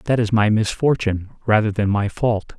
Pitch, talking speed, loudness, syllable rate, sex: 110 Hz, 185 wpm, -19 LUFS, 5.0 syllables/s, male